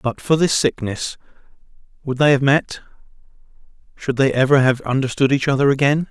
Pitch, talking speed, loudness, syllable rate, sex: 135 Hz, 145 wpm, -18 LUFS, 5.4 syllables/s, male